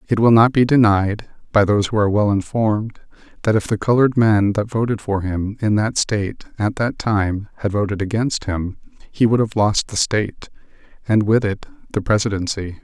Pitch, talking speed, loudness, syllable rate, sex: 105 Hz, 190 wpm, -18 LUFS, 5.3 syllables/s, male